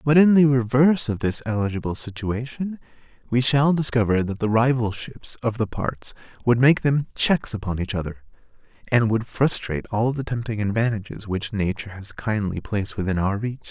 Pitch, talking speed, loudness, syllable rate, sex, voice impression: 115 Hz, 170 wpm, -22 LUFS, 5.3 syllables/s, male, masculine, adult-like, tensed, clear, fluent, cool, sincere, friendly, reassuring, slightly wild, lively, kind